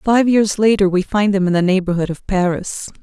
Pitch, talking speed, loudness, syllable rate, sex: 195 Hz, 220 wpm, -16 LUFS, 5.2 syllables/s, female